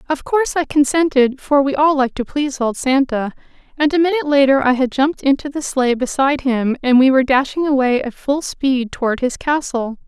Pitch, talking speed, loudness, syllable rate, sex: 270 Hz, 210 wpm, -16 LUFS, 5.6 syllables/s, female